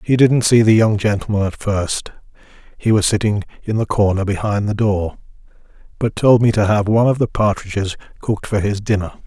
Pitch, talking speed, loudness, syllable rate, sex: 105 Hz, 180 wpm, -17 LUFS, 5.5 syllables/s, male